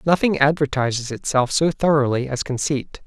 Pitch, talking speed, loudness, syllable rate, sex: 140 Hz, 135 wpm, -20 LUFS, 5.1 syllables/s, male